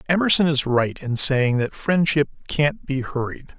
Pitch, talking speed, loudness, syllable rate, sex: 145 Hz, 165 wpm, -20 LUFS, 4.4 syllables/s, male